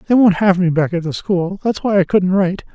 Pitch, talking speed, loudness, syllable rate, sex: 185 Hz, 260 wpm, -16 LUFS, 5.9 syllables/s, male